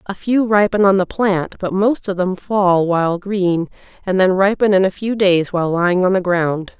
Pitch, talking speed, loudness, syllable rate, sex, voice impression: 190 Hz, 220 wpm, -16 LUFS, 4.8 syllables/s, female, feminine, adult-like, tensed, slightly soft, slightly muffled, intellectual, calm, slightly friendly, reassuring, elegant, slightly lively, slightly kind